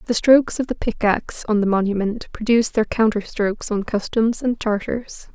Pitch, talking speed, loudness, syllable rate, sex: 220 Hz, 180 wpm, -20 LUFS, 5.3 syllables/s, female